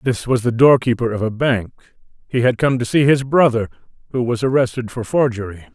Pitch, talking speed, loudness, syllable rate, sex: 120 Hz, 200 wpm, -17 LUFS, 5.8 syllables/s, male